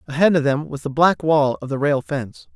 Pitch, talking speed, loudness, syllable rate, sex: 145 Hz, 260 wpm, -19 LUFS, 5.5 syllables/s, male